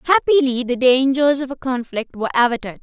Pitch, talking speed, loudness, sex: 260 Hz, 170 wpm, -18 LUFS, female